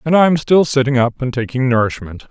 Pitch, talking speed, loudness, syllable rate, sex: 135 Hz, 210 wpm, -15 LUFS, 5.4 syllables/s, male